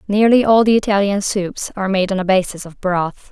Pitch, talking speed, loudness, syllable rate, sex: 195 Hz, 215 wpm, -16 LUFS, 5.5 syllables/s, female